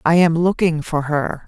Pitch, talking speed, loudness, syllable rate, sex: 160 Hz, 205 wpm, -18 LUFS, 4.4 syllables/s, female